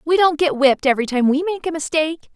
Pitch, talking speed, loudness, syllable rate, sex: 305 Hz, 255 wpm, -18 LUFS, 7.1 syllables/s, female